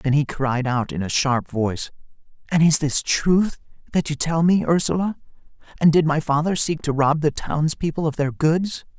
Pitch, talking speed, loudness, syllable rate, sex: 150 Hz, 200 wpm, -21 LUFS, 4.8 syllables/s, male